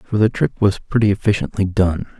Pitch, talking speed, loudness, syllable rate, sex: 100 Hz, 190 wpm, -18 LUFS, 5.5 syllables/s, male